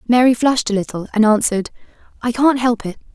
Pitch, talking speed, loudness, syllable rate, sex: 230 Hz, 190 wpm, -17 LUFS, 6.6 syllables/s, female